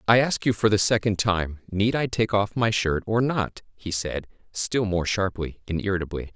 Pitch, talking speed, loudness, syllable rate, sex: 100 Hz, 200 wpm, -24 LUFS, 4.8 syllables/s, male